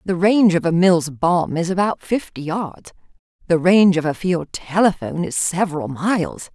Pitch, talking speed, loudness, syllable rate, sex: 175 Hz, 175 wpm, -18 LUFS, 4.9 syllables/s, female